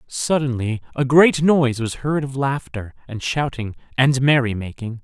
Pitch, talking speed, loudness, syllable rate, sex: 130 Hz, 155 wpm, -19 LUFS, 4.6 syllables/s, male